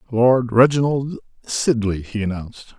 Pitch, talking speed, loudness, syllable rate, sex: 120 Hz, 110 wpm, -19 LUFS, 4.5 syllables/s, male